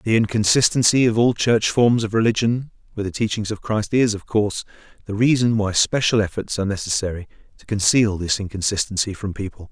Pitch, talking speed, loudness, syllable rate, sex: 105 Hz, 180 wpm, -20 LUFS, 5.8 syllables/s, male